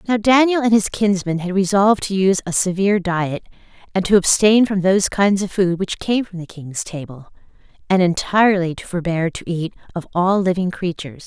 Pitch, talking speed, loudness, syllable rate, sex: 190 Hz, 190 wpm, -18 LUFS, 5.4 syllables/s, female